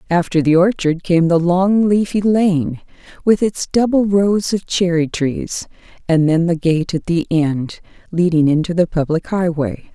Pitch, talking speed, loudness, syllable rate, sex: 175 Hz, 165 wpm, -16 LUFS, 4.2 syllables/s, female